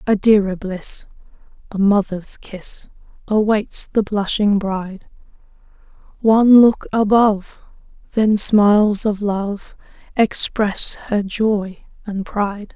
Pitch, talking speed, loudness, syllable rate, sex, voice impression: 205 Hz, 105 wpm, -17 LUFS, 3.4 syllables/s, female, feminine, adult-like, relaxed, slightly weak, soft, slightly halting, raspy, calm, slightly reassuring, kind, modest